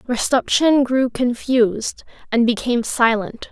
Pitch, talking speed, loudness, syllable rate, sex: 245 Hz, 100 wpm, -18 LUFS, 4.2 syllables/s, female